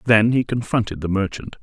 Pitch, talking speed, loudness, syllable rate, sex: 110 Hz, 185 wpm, -20 LUFS, 5.6 syllables/s, male